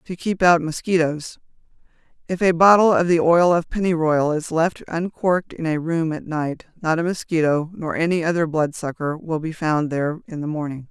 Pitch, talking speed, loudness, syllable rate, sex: 165 Hz, 185 wpm, -20 LUFS, 5.1 syllables/s, female